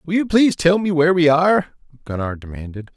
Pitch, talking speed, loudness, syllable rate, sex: 150 Hz, 205 wpm, -17 LUFS, 6.1 syllables/s, male